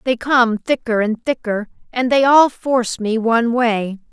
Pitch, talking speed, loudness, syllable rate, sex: 235 Hz, 175 wpm, -17 LUFS, 4.4 syllables/s, female